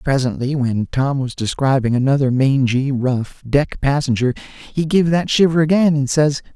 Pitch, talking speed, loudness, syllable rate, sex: 135 Hz, 155 wpm, -17 LUFS, 4.7 syllables/s, male